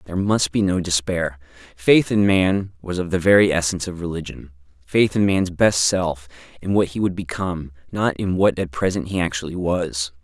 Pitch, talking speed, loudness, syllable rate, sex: 85 Hz, 195 wpm, -20 LUFS, 5.2 syllables/s, male